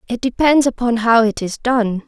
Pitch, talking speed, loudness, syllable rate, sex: 235 Hz, 200 wpm, -16 LUFS, 4.8 syllables/s, female